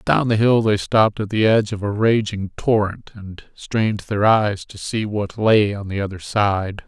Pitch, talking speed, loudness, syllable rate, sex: 105 Hz, 210 wpm, -19 LUFS, 4.5 syllables/s, male